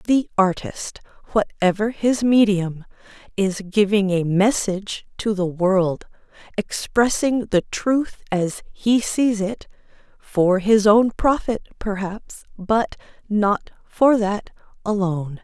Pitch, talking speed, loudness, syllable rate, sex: 205 Hz, 115 wpm, -20 LUFS, 3.5 syllables/s, female